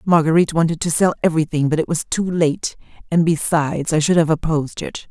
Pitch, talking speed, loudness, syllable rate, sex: 160 Hz, 200 wpm, -18 LUFS, 6.2 syllables/s, female